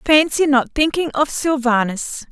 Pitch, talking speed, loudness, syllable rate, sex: 280 Hz, 130 wpm, -17 LUFS, 4.2 syllables/s, female